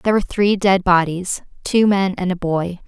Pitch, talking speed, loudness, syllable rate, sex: 190 Hz, 210 wpm, -18 LUFS, 5.0 syllables/s, female